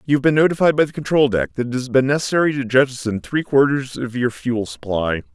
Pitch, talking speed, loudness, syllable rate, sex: 130 Hz, 235 wpm, -19 LUFS, 6.2 syllables/s, male